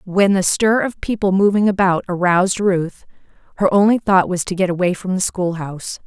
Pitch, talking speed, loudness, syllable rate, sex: 190 Hz, 190 wpm, -17 LUFS, 5.2 syllables/s, female